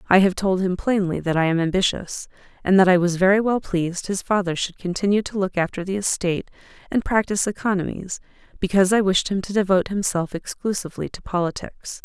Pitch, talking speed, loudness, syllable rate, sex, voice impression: 190 Hz, 190 wpm, -21 LUFS, 6.1 syllables/s, female, feminine, adult-like, slightly relaxed, powerful, slightly soft, fluent, raspy, intellectual, slightly calm, friendly, reassuring, elegant, kind, modest